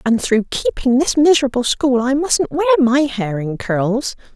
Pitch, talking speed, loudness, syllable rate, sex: 260 Hz, 180 wpm, -16 LUFS, 4.3 syllables/s, female